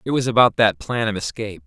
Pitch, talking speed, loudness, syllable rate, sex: 110 Hz, 250 wpm, -19 LUFS, 6.5 syllables/s, male